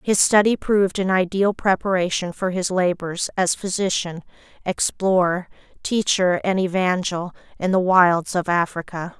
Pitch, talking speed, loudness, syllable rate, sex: 185 Hz, 130 wpm, -20 LUFS, 4.5 syllables/s, female